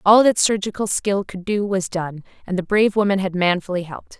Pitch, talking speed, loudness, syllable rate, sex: 195 Hz, 215 wpm, -20 LUFS, 5.7 syllables/s, female